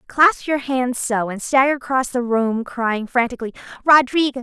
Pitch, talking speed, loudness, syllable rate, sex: 255 Hz, 165 wpm, -18 LUFS, 5.1 syllables/s, female